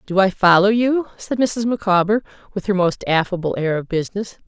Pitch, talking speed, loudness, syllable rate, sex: 195 Hz, 190 wpm, -18 LUFS, 5.5 syllables/s, female